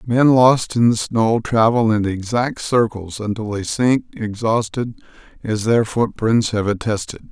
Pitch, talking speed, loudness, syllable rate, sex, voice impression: 115 Hz, 150 wpm, -18 LUFS, 4.0 syllables/s, male, very masculine, very adult-like, very middle-aged, very thick, relaxed, slightly weak, slightly bright, slightly soft, slightly muffled, fluent, raspy, cool, very intellectual, sincere, calm, very mature, very friendly, reassuring, unique, wild, sweet, very kind, modest